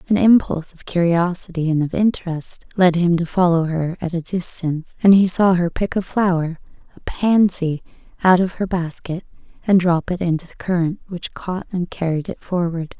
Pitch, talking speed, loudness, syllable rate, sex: 175 Hz, 185 wpm, -19 LUFS, 5.1 syllables/s, female